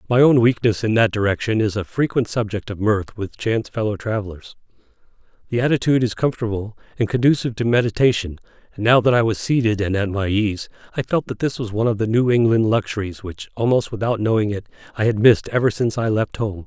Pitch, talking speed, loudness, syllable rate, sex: 110 Hz, 210 wpm, -20 LUFS, 6.3 syllables/s, male